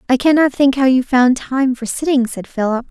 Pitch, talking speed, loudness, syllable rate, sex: 260 Hz, 225 wpm, -15 LUFS, 5.2 syllables/s, female